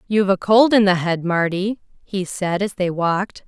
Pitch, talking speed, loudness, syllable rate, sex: 190 Hz, 205 wpm, -19 LUFS, 4.8 syllables/s, female